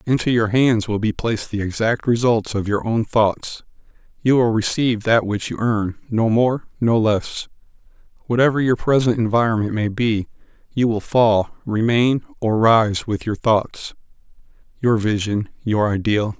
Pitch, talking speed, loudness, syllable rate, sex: 110 Hz, 155 wpm, -19 LUFS, 4.4 syllables/s, male